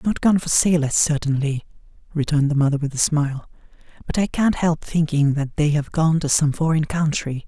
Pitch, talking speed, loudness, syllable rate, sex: 150 Hz, 195 wpm, -20 LUFS, 5.4 syllables/s, male